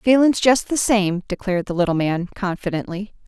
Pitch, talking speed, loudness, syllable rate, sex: 200 Hz, 165 wpm, -20 LUFS, 5.3 syllables/s, female